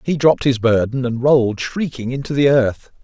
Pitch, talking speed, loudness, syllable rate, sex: 130 Hz, 200 wpm, -17 LUFS, 5.3 syllables/s, male